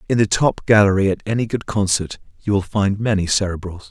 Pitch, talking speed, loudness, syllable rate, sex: 100 Hz, 200 wpm, -18 LUFS, 5.8 syllables/s, male